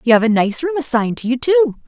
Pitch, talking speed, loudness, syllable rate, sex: 265 Hz, 285 wpm, -16 LUFS, 7.6 syllables/s, female